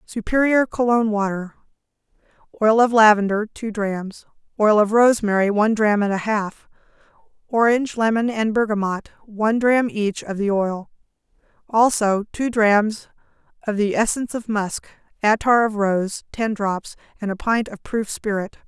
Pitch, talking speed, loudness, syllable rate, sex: 215 Hz, 140 wpm, -20 LUFS, 4.8 syllables/s, female